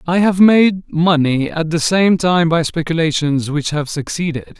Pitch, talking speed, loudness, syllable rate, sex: 165 Hz, 170 wpm, -15 LUFS, 4.3 syllables/s, male